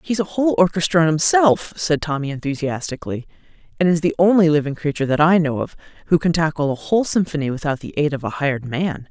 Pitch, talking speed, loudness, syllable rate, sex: 160 Hz, 210 wpm, -19 LUFS, 6.5 syllables/s, female